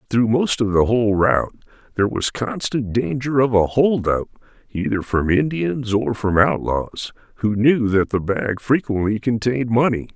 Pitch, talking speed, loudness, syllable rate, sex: 115 Hz, 165 wpm, -19 LUFS, 4.7 syllables/s, male